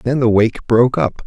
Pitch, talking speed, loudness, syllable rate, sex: 120 Hz, 235 wpm, -15 LUFS, 5.0 syllables/s, male